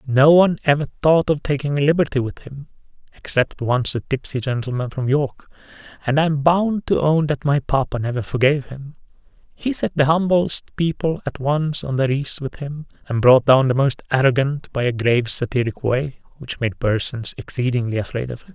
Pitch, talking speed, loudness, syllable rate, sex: 140 Hz, 190 wpm, -19 LUFS, 3.9 syllables/s, male